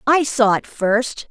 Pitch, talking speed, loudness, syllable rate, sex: 235 Hz, 185 wpm, -18 LUFS, 3.5 syllables/s, female